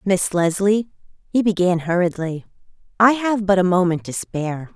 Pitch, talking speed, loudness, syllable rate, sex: 190 Hz, 150 wpm, -19 LUFS, 4.8 syllables/s, female